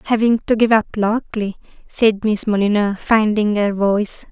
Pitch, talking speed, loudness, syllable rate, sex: 215 Hz, 155 wpm, -17 LUFS, 4.5 syllables/s, female